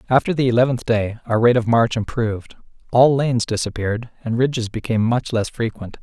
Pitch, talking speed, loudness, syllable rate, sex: 115 Hz, 180 wpm, -19 LUFS, 5.9 syllables/s, male